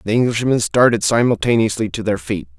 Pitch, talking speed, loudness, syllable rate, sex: 105 Hz, 165 wpm, -17 LUFS, 5.9 syllables/s, male